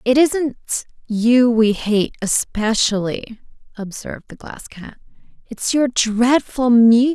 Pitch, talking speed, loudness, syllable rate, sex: 235 Hz, 120 wpm, -17 LUFS, 3.5 syllables/s, female